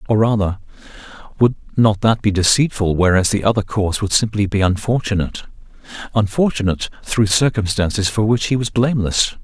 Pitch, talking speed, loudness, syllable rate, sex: 105 Hz, 140 wpm, -17 LUFS, 5.9 syllables/s, male